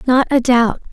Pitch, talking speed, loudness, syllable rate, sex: 250 Hz, 195 wpm, -14 LUFS, 4.6 syllables/s, female